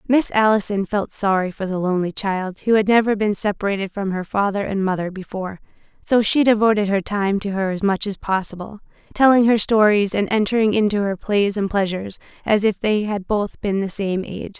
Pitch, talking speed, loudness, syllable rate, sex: 200 Hz, 200 wpm, -19 LUFS, 5.6 syllables/s, female